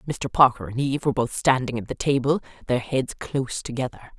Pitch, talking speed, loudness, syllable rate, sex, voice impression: 130 Hz, 200 wpm, -24 LUFS, 6.2 syllables/s, female, slightly feminine, very gender-neutral, adult-like, middle-aged, very tensed, powerful, very bright, soft, very clear, very fluent, slightly cool, very intellectual, refreshing, sincere, slightly calm, very friendly, very reassuring, very unique, very elegant, very lively, kind, intense, slightly light